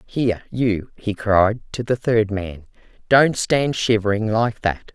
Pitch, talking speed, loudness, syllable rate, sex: 110 Hz, 160 wpm, -20 LUFS, 3.9 syllables/s, female